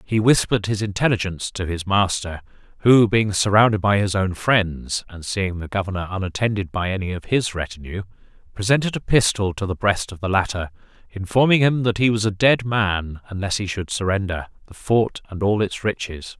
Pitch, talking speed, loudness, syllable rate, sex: 100 Hz, 185 wpm, -21 LUFS, 5.3 syllables/s, male